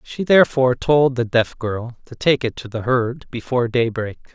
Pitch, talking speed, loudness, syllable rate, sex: 125 Hz, 195 wpm, -19 LUFS, 5.0 syllables/s, male